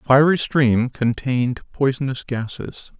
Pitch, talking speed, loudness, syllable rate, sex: 130 Hz, 100 wpm, -20 LUFS, 4.1 syllables/s, male